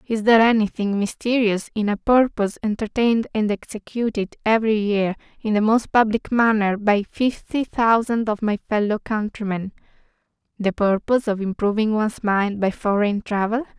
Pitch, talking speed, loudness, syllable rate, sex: 215 Hz, 140 wpm, -21 LUFS, 5.1 syllables/s, female